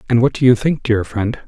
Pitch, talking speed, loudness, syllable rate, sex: 120 Hz, 285 wpm, -16 LUFS, 5.7 syllables/s, male